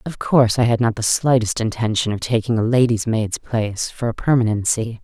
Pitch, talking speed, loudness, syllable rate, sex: 115 Hz, 205 wpm, -19 LUFS, 5.5 syllables/s, female